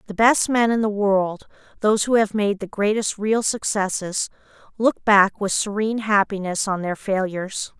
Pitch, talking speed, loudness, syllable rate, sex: 205 Hz, 170 wpm, -21 LUFS, 4.7 syllables/s, female